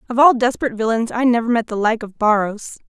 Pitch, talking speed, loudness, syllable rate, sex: 230 Hz, 225 wpm, -17 LUFS, 6.5 syllables/s, female